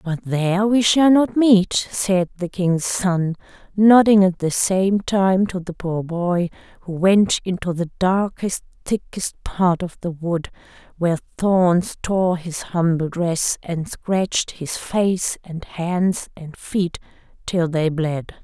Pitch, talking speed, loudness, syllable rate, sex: 180 Hz, 150 wpm, -20 LUFS, 3.4 syllables/s, female